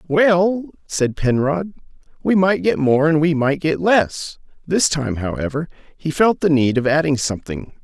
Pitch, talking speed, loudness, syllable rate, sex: 155 Hz, 170 wpm, -18 LUFS, 4.4 syllables/s, male